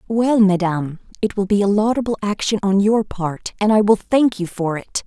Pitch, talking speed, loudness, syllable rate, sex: 205 Hz, 215 wpm, -18 LUFS, 5.1 syllables/s, female